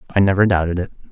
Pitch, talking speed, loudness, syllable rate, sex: 95 Hz, 215 wpm, -17 LUFS, 8.0 syllables/s, male